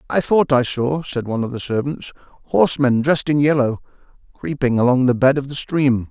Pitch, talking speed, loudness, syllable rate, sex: 135 Hz, 195 wpm, -18 LUFS, 5.6 syllables/s, male